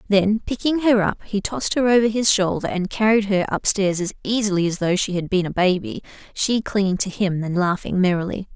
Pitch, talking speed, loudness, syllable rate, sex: 195 Hz, 215 wpm, -20 LUFS, 5.5 syllables/s, female